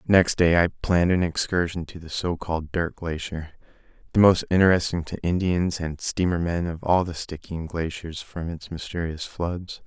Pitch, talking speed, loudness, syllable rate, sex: 85 Hz, 170 wpm, -24 LUFS, 4.7 syllables/s, male